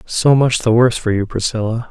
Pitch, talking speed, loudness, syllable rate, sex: 115 Hz, 220 wpm, -15 LUFS, 5.6 syllables/s, male